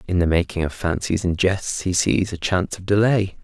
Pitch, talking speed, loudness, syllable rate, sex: 95 Hz, 225 wpm, -21 LUFS, 5.3 syllables/s, male